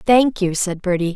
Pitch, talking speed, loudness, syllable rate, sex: 195 Hz, 210 wpm, -18 LUFS, 4.5 syllables/s, female